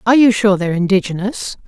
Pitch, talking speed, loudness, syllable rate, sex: 205 Hz, 180 wpm, -15 LUFS, 6.8 syllables/s, female